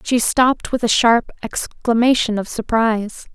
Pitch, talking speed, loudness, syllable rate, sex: 230 Hz, 145 wpm, -17 LUFS, 4.5 syllables/s, female